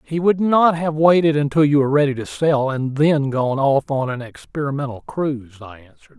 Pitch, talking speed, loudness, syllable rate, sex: 140 Hz, 205 wpm, -18 LUFS, 5.5 syllables/s, male